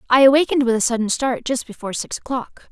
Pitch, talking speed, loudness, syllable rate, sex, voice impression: 250 Hz, 220 wpm, -19 LUFS, 6.8 syllables/s, female, feminine, slightly adult-like, slightly fluent, slightly cute, slightly intellectual